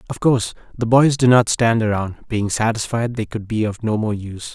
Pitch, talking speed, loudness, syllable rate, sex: 110 Hz, 225 wpm, -19 LUFS, 5.5 syllables/s, male